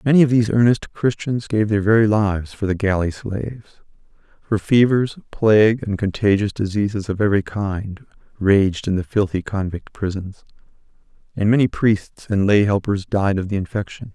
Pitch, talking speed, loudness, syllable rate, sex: 105 Hz, 160 wpm, -19 LUFS, 5.1 syllables/s, male